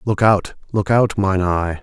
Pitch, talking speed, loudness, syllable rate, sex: 100 Hz, 195 wpm, -18 LUFS, 3.8 syllables/s, male